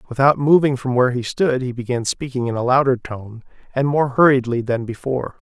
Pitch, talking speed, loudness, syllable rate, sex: 130 Hz, 200 wpm, -19 LUFS, 5.7 syllables/s, male